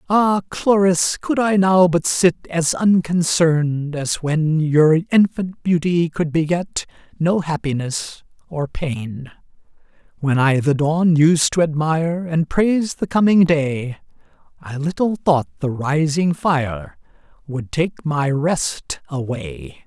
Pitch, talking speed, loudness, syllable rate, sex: 160 Hz, 130 wpm, -18 LUFS, 3.5 syllables/s, male